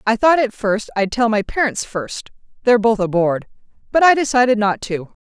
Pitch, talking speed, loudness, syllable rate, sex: 220 Hz, 170 wpm, -17 LUFS, 5.2 syllables/s, female